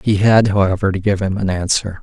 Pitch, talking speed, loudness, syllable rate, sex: 100 Hz, 235 wpm, -16 LUFS, 5.7 syllables/s, male